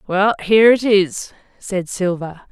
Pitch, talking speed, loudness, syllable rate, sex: 195 Hz, 145 wpm, -16 LUFS, 4.1 syllables/s, female